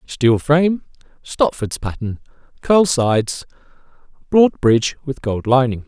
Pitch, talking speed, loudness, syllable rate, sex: 135 Hz, 110 wpm, -17 LUFS, 4.2 syllables/s, male